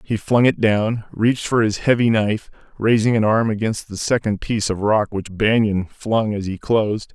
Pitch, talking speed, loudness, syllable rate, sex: 110 Hz, 200 wpm, -19 LUFS, 4.9 syllables/s, male